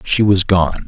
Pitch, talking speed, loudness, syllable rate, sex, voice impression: 95 Hz, 205 wpm, -14 LUFS, 3.9 syllables/s, male, masculine, adult-like, tensed, slightly hard, fluent, slightly raspy, cool, intellectual, calm, wild, slightly lively